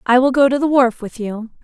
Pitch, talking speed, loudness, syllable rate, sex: 250 Hz, 295 wpm, -16 LUFS, 5.7 syllables/s, female